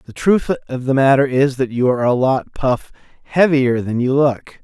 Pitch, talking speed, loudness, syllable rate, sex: 130 Hz, 180 wpm, -16 LUFS, 4.9 syllables/s, male